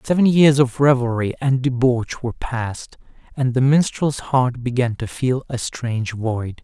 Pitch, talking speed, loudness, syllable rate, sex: 125 Hz, 165 wpm, -19 LUFS, 4.5 syllables/s, male